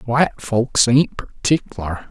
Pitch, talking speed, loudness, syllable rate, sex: 120 Hz, 115 wpm, -18 LUFS, 3.6 syllables/s, male